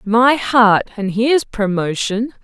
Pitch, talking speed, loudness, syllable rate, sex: 225 Hz, 125 wpm, -15 LUFS, 3.8 syllables/s, female